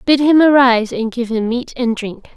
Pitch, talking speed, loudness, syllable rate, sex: 245 Hz, 230 wpm, -14 LUFS, 5.1 syllables/s, female